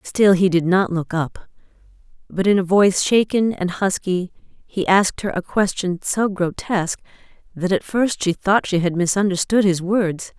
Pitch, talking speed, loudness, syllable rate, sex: 190 Hz, 175 wpm, -19 LUFS, 4.6 syllables/s, female